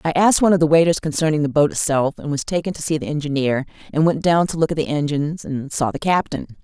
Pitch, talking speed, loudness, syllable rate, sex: 155 Hz, 260 wpm, -19 LUFS, 6.7 syllables/s, female